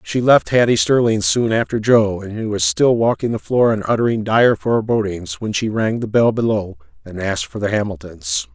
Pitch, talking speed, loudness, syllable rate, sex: 110 Hz, 205 wpm, -17 LUFS, 5.2 syllables/s, male